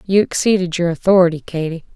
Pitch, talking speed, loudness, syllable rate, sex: 175 Hz, 155 wpm, -16 LUFS, 6.2 syllables/s, female